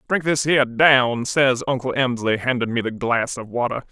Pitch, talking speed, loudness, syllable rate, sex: 125 Hz, 200 wpm, -20 LUFS, 5.0 syllables/s, male